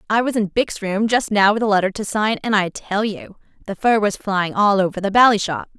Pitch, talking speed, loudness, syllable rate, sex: 205 Hz, 260 wpm, -18 LUFS, 5.4 syllables/s, female